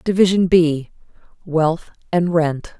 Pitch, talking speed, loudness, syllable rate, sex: 170 Hz, 85 wpm, -18 LUFS, 3.6 syllables/s, female